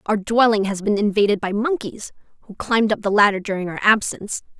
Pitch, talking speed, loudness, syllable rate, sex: 210 Hz, 195 wpm, -19 LUFS, 6.1 syllables/s, female